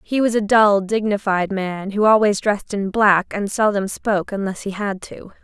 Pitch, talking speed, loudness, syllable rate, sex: 205 Hz, 200 wpm, -19 LUFS, 4.8 syllables/s, female